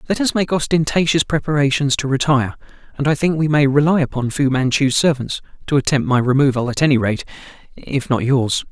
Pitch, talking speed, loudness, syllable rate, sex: 140 Hz, 180 wpm, -17 LUFS, 5.7 syllables/s, male